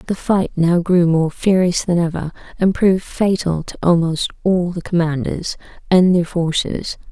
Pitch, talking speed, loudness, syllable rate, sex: 175 Hz, 160 wpm, -17 LUFS, 4.5 syllables/s, female